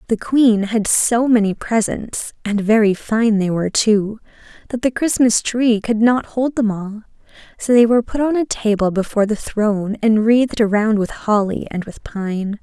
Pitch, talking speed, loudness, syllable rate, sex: 220 Hz, 185 wpm, -17 LUFS, 4.6 syllables/s, female